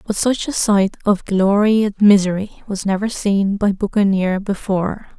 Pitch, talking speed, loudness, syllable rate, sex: 200 Hz, 160 wpm, -17 LUFS, 4.6 syllables/s, female